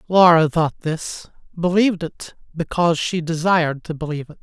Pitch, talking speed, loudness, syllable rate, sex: 165 Hz, 150 wpm, -19 LUFS, 5.4 syllables/s, male